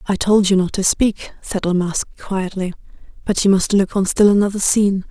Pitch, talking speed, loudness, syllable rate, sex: 195 Hz, 210 wpm, -17 LUFS, 5.3 syllables/s, female